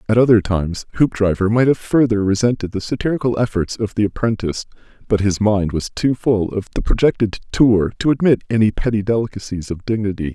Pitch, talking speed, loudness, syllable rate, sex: 110 Hz, 180 wpm, -18 LUFS, 6.0 syllables/s, male